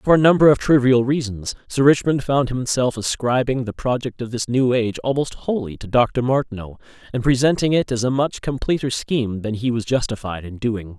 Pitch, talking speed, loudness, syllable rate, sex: 125 Hz, 195 wpm, -20 LUFS, 5.3 syllables/s, male